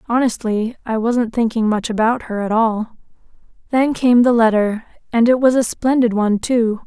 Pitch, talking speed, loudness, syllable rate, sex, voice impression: 230 Hz, 165 wpm, -17 LUFS, 4.9 syllables/s, female, feminine, slightly adult-like, slightly soft, friendly, slightly reassuring, kind